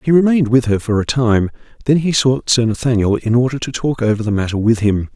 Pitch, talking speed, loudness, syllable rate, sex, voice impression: 120 Hz, 245 wpm, -16 LUFS, 6.0 syllables/s, male, very masculine, old, very thick, slightly tensed, powerful, slightly dark, soft, muffled, fluent, raspy, cool, intellectual, slightly refreshing, sincere, slightly calm, mature, friendly, slightly reassuring, unique, slightly elegant, wild, slightly sweet, slightly lively, slightly kind, slightly intense, modest